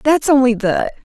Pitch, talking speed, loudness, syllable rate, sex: 260 Hz, 155 wpm, -15 LUFS, 5.1 syllables/s, female